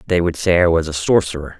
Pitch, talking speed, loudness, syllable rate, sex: 85 Hz, 265 wpm, -17 LUFS, 6.5 syllables/s, male